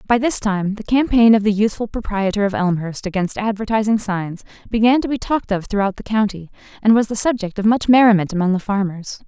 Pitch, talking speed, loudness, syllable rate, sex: 210 Hz, 205 wpm, -18 LUFS, 5.9 syllables/s, female